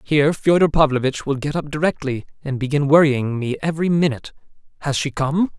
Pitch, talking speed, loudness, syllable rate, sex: 145 Hz, 170 wpm, -19 LUFS, 6.0 syllables/s, male